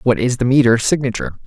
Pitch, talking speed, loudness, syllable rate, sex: 125 Hz, 205 wpm, -16 LUFS, 6.8 syllables/s, male